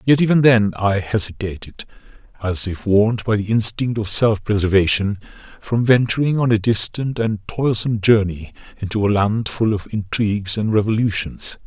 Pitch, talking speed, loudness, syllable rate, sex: 105 Hz, 155 wpm, -18 LUFS, 5.0 syllables/s, male